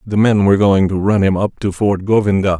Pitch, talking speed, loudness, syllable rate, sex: 100 Hz, 255 wpm, -14 LUFS, 5.7 syllables/s, male